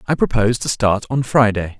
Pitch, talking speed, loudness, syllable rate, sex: 110 Hz, 200 wpm, -17 LUFS, 5.7 syllables/s, male